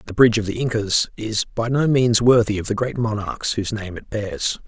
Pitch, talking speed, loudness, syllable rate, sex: 110 Hz, 230 wpm, -20 LUFS, 5.2 syllables/s, male